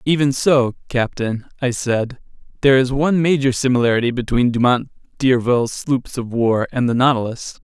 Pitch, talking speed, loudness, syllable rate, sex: 125 Hz, 150 wpm, -18 LUFS, 5.3 syllables/s, male